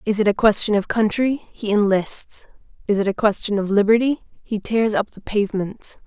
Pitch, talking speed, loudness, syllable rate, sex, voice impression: 210 Hz, 190 wpm, -20 LUFS, 5.0 syllables/s, female, feminine, adult-like, tensed, slightly powerful, clear, fluent, intellectual, friendly, elegant, lively, slightly sharp